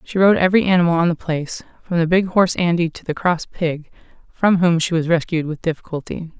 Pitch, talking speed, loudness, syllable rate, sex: 170 Hz, 215 wpm, -18 LUFS, 6.0 syllables/s, female